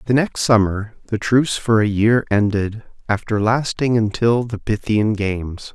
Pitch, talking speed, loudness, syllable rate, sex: 110 Hz, 155 wpm, -18 LUFS, 4.5 syllables/s, male